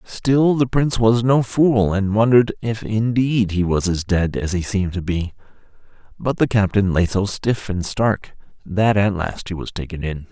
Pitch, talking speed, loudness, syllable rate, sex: 105 Hz, 200 wpm, -19 LUFS, 4.6 syllables/s, male